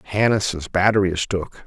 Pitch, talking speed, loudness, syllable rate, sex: 95 Hz, 145 wpm, -20 LUFS, 5.0 syllables/s, male